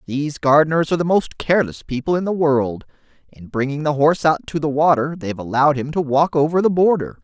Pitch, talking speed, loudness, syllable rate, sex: 150 Hz, 215 wpm, -18 LUFS, 6.3 syllables/s, male